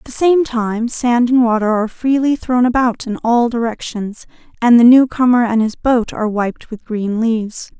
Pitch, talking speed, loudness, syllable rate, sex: 235 Hz, 195 wpm, -15 LUFS, 4.8 syllables/s, female